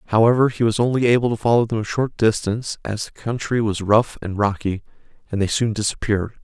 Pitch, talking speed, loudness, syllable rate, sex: 110 Hz, 205 wpm, -20 LUFS, 6.2 syllables/s, male